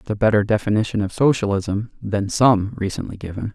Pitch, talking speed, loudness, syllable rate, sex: 105 Hz, 170 wpm, -20 LUFS, 5.6 syllables/s, male